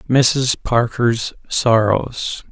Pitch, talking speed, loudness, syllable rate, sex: 120 Hz, 70 wpm, -17 LUFS, 2.3 syllables/s, male